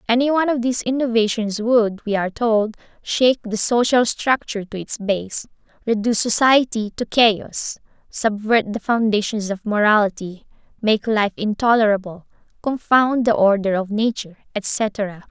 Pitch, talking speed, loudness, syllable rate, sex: 220 Hz, 135 wpm, -19 LUFS, 4.8 syllables/s, female